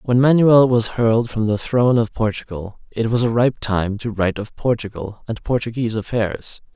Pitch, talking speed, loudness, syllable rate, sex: 115 Hz, 185 wpm, -19 LUFS, 5.1 syllables/s, male